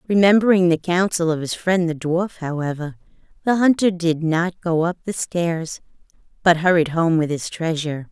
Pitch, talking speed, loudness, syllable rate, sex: 170 Hz, 170 wpm, -20 LUFS, 4.9 syllables/s, female